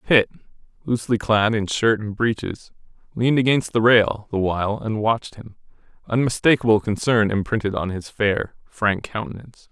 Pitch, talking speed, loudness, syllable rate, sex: 110 Hz, 150 wpm, -21 LUFS, 5.2 syllables/s, male